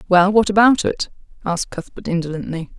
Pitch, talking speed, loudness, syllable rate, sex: 185 Hz, 150 wpm, -18 LUFS, 5.9 syllables/s, female